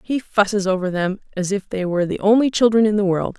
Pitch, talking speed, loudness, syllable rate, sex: 200 Hz, 250 wpm, -19 LUFS, 6.1 syllables/s, female